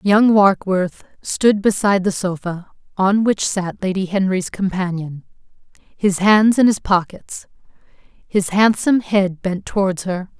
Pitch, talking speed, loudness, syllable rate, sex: 195 Hz, 135 wpm, -17 LUFS, 4.0 syllables/s, female